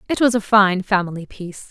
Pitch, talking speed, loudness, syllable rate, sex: 200 Hz, 210 wpm, -17 LUFS, 6.0 syllables/s, female